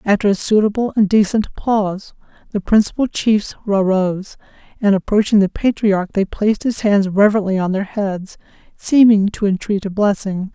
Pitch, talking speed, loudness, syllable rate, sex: 205 Hz, 155 wpm, -16 LUFS, 5.1 syllables/s, female